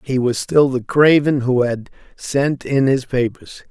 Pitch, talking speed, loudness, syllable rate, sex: 130 Hz, 180 wpm, -17 LUFS, 3.9 syllables/s, male